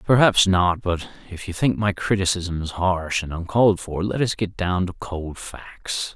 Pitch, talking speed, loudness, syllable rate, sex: 95 Hz, 185 wpm, -22 LUFS, 4.1 syllables/s, male